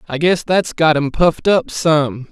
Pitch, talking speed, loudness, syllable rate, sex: 155 Hz, 205 wpm, -15 LUFS, 4.2 syllables/s, male